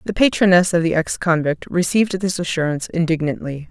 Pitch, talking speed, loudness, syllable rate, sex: 175 Hz, 160 wpm, -18 LUFS, 5.9 syllables/s, female